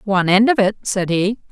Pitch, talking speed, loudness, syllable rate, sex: 205 Hz, 235 wpm, -16 LUFS, 5.5 syllables/s, female